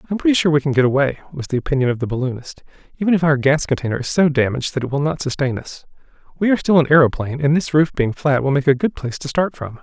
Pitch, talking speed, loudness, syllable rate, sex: 145 Hz, 280 wpm, -18 LUFS, 7.4 syllables/s, male